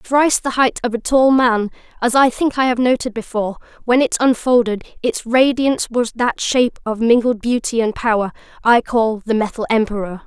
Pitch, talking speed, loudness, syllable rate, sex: 235 Hz, 175 wpm, -17 LUFS, 5.2 syllables/s, female